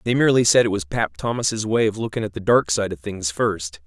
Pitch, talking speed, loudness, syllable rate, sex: 100 Hz, 265 wpm, -21 LUFS, 5.6 syllables/s, male